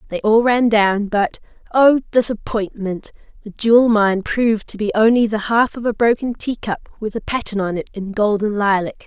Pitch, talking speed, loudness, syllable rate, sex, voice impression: 215 Hz, 180 wpm, -17 LUFS, 5.0 syllables/s, female, feminine, adult-like, tensed, powerful, slightly bright, clear, fluent, intellectual, friendly, lively, intense